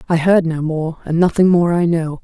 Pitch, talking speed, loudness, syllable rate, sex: 170 Hz, 240 wpm, -16 LUFS, 5.0 syllables/s, female